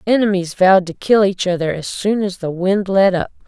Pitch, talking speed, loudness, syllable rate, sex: 190 Hz, 225 wpm, -16 LUFS, 5.4 syllables/s, female